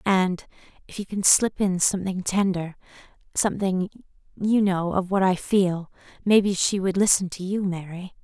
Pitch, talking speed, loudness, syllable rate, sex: 190 Hz, 155 wpm, -23 LUFS, 4.9 syllables/s, female